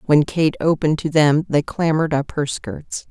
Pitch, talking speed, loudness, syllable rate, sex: 150 Hz, 195 wpm, -19 LUFS, 4.9 syllables/s, female